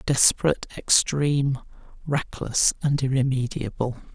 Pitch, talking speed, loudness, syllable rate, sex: 135 Hz, 70 wpm, -23 LUFS, 4.6 syllables/s, male